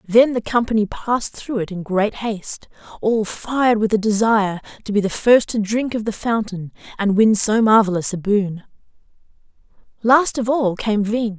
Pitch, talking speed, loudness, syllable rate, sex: 215 Hz, 175 wpm, -18 LUFS, 4.8 syllables/s, female